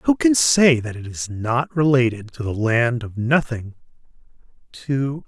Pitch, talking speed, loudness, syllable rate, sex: 130 Hz, 160 wpm, -20 LUFS, 4.2 syllables/s, male